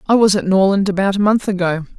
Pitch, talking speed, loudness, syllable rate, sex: 195 Hz, 240 wpm, -15 LUFS, 6.2 syllables/s, female